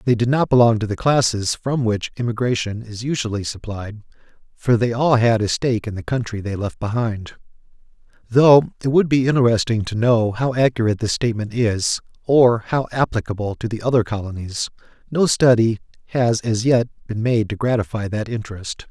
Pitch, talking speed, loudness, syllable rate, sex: 115 Hz, 175 wpm, -19 LUFS, 5.4 syllables/s, male